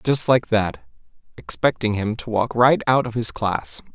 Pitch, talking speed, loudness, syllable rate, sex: 115 Hz, 180 wpm, -20 LUFS, 4.4 syllables/s, male